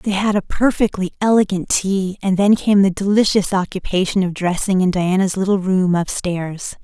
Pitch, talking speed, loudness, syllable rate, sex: 190 Hz, 165 wpm, -17 LUFS, 4.9 syllables/s, female